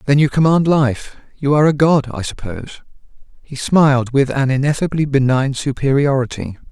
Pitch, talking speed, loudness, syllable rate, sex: 140 Hz, 150 wpm, -16 LUFS, 5.4 syllables/s, male